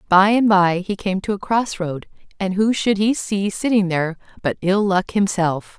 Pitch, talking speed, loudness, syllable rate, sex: 195 Hz, 205 wpm, -19 LUFS, 4.6 syllables/s, female